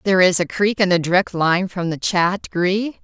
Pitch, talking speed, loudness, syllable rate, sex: 185 Hz, 235 wpm, -18 LUFS, 5.0 syllables/s, female